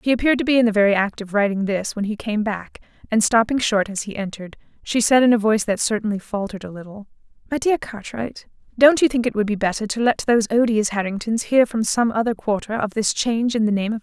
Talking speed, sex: 250 wpm, female